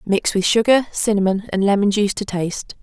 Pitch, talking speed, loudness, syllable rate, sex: 205 Hz, 190 wpm, -18 LUFS, 5.8 syllables/s, female